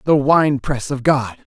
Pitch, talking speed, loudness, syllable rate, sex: 135 Hz, 195 wpm, -17 LUFS, 3.8 syllables/s, male